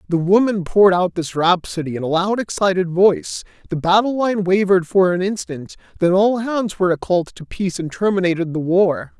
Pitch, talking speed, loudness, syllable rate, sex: 185 Hz, 190 wpm, -18 LUFS, 5.6 syllables/s, male